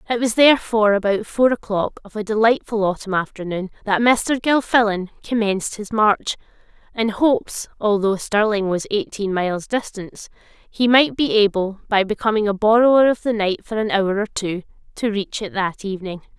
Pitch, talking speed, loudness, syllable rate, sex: 210 Hz, 170 wpm, -19 LUFS, 5.1 syllables/s, female